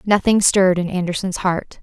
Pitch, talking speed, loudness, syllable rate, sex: 185 Hz, 165 wpm, -17 LUFS, 5.2 syllables/s, female